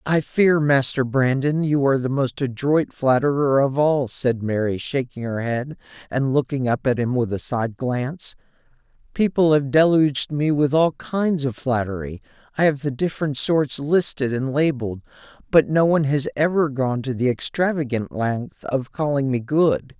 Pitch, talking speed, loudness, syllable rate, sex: 140 Hz, 165 wpm, -21 LUFS, 4.7 syllables/s, male